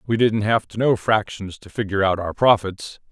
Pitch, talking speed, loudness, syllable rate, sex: 105 Hz, 210 wpm, -20 LUFS, 5.2 syllables/s, male